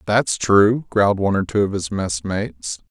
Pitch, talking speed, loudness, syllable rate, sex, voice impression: 100 Hz, 185 wpm, -19 LUFS, 5.0 syllables/s, male, masculine, middle-aged, tensed, hard, intellectual, sincere, friendly, reassuring, wild, lively, kind, slightly modest